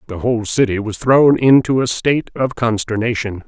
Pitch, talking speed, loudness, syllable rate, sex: 115 Hz, 175 wpm, -16 LUFS, 5.3 syllables/s, male